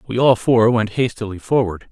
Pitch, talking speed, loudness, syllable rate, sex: 115 Hz, 190 wpm, -17 LUFS, 5.1 syllables/s, male